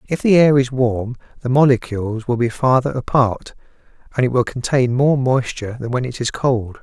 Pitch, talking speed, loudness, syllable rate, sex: 125 Hz, 195 wpm, -18 LUFS, 5.2 syllables/s, male